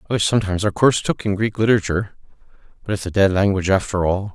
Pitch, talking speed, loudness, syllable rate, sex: 100 Hz, 220 wpm, -19 LUFS, 7.7 syllables/s, male